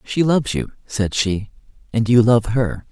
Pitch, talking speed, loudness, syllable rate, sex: 115 Hz, 185 wpm, -19 LUFS, 4.4 syllables/s, male